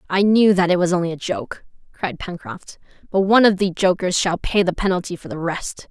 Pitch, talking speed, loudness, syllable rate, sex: 185 Hz, 225 wpm, -19 LUFS, 5.5 syllables/s, female